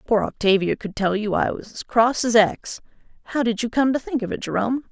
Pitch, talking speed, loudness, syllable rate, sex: 225 Hz, 245 wpm, -21 LUFS, 5.7 syllables/s, female